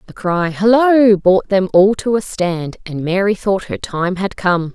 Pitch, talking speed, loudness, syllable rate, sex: 195 Hz, 200 wpm, -15 LUFS, 4.0 syllables/s, female